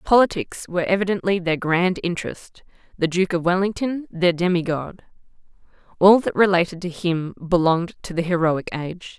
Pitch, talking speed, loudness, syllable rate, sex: 180 Hz, 150 wpm, -21 LUFS, 5.2 syllables/s, female